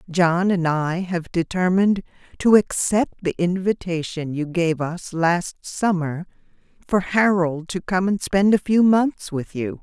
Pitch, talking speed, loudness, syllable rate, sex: 180 Hz, 155 wpm, -21 LUFS, 4.0 syllables/s, female